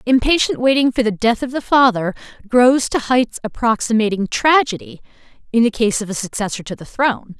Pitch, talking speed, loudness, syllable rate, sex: 235 Hz, 180 wpm, -17 LUFS, 5.5 syllables/s, female